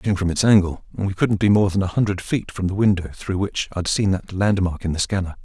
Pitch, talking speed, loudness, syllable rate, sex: 95 Hz, 265 wpm, -21 LUFS, 5.8 syllables/s, male